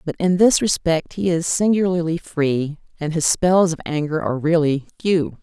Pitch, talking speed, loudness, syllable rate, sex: 165 Hz, 175 wpm, -19 LUFS, 4.6 syllables/s, female